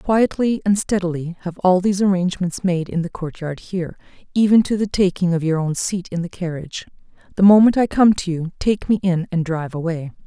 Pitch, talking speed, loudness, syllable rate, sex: 180 Hz, 205 wpm, -19 LUFS, 5.7 syllables/s, female